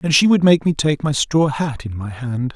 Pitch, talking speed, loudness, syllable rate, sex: 145 Hz, 280 wpm, -18 LUFS, 4.9 syllables/s, male